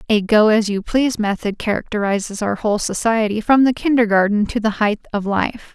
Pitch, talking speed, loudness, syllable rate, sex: 215 Hz, 190 wpm, -18 LUFS, 5.5 syllables/s, female